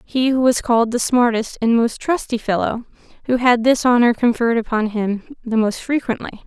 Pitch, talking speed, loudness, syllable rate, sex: 235 Hz, 175 wpm, -18 LUFS, 5.1 syllables/s, female